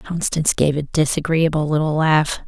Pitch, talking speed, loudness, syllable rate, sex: 155 Hz, 145 wpm, -18 LUFS, 5.1 syllables/s, female